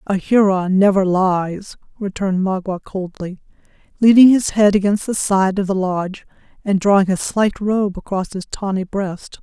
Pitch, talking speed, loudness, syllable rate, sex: 195 Hz, 160 wpm, -17 LUFS, 4.6 syllables/s, female